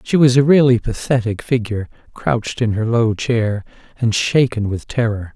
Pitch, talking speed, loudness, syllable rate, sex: 115 Hz, 170 wpm, -17 LUFS, 5.0 syllables/s, male